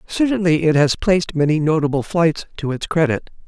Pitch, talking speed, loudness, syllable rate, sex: 160 Hz, 175 wpm, -18 LUFS, 5.6 syllables/s, male